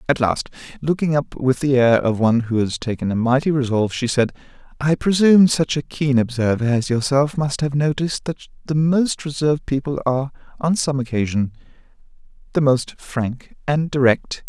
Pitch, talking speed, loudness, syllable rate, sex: 135 Hz, 175 wpm, -19 LUFS, 5.2 syllables/s, male